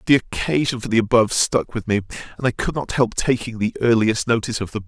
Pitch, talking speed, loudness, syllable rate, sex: 115 Hz, 235 wpm, -20 LUFS, 6.3 syllables/s, male